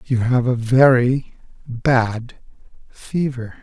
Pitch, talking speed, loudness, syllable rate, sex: 125 Hz, 100 wpm, -18 LUFS, 2.9 syllables/s, male